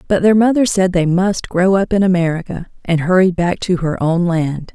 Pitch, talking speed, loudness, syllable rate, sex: 180 Hz, 215 wpm, -15 LUFS, 5.0 syllables/s, female